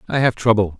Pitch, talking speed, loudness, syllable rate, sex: 110 Hz, 225 wpm, -18 LUFS, 6.6 syllables/s, male